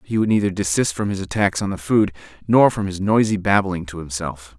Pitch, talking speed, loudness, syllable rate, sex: 95 Hz, 225 wpm, -20 LUFS, 5.5 syllables/s, male